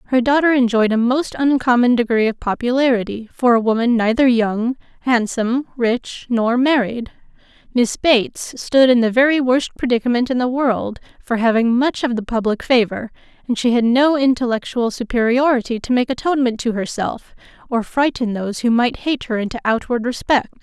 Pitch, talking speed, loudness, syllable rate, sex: 240 Hz, 165 wpm, -17 LUFS, 5.2 syllables/s, female